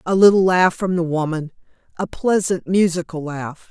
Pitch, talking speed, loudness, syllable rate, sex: 175 Hz, 145 wpm, -19 LUFS, 4.8 syllables/s, female